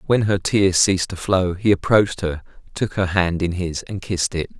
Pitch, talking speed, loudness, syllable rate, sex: 95 Hz, 220 wpm, -20 LUFS, 5.2 syllables/s, male